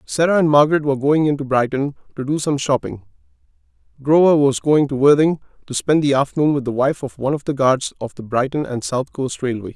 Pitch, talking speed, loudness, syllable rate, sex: 140 Hz, 215 wpm, -18 LUFS, 6.0 syllables/s, male